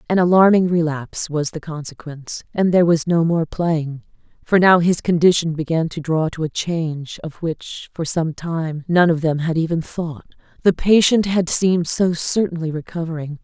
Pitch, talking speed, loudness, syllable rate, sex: 165 Hz, 180 wpm, -19 LUFS, 4.9 syllables/s, female